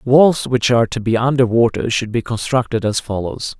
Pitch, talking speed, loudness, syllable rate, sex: 120 Hz, 200 wpm, -17 LUFS, 5.1 syllables/s, male